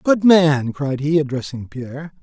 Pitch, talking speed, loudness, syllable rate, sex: 145 Hz, 160 wpm, -17 LUFS, 4.4 syllables/s, male